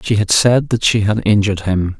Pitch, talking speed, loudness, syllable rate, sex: 105 Hz, 240 wpm, -14 LUFS, 5.3 syllables/s, male